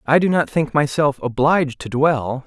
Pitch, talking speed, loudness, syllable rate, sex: 140 Hz, 195 wpm, -18 LUFS, 4.7 syllables/s, male